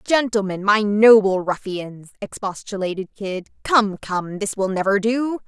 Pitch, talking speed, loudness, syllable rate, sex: 205 Hz, 120 wpm, -20 LUFS, 4.2 syllables/s, female